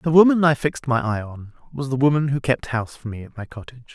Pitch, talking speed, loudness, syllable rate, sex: 130 Hz, 275 wpm, -20 LUFS, 6.5 syllables/s, male